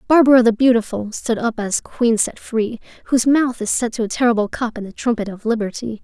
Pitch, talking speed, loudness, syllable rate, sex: 230 Hz, 220 wpm, -18 LUFS, 5.8 syllables/s, female